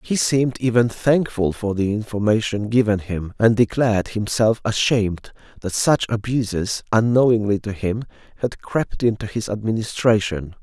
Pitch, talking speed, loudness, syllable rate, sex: 110 Hz, 135 wpm, -20 LUFS, 4.8 syllables/s, male